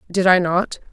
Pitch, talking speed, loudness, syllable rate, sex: 185 Hz, 195 wpm, -17 LUFS, 4.8 syllables/s, female